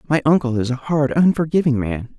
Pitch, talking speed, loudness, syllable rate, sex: 140 Hz, 190 wpm, -18 LUFS, 5.6 syllables/s, male